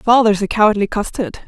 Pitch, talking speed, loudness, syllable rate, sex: 215 Hz, 165 wpm, -16 LUFS, 5.6 syllables/s, female